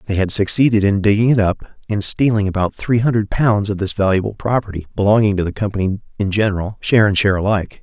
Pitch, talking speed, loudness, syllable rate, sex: 100 Hz, 205 wpm, -17 LUFS, 6.5 syllables/s, male